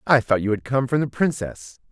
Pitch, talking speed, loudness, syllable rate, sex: 120 Hz, 250 wpm, -22 LUFS, 5.3 syllables/s, male